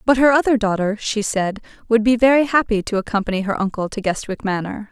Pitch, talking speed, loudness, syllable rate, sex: 220 Hz, 210 wpm, -19 LUFS, 6.0 syllables/s, female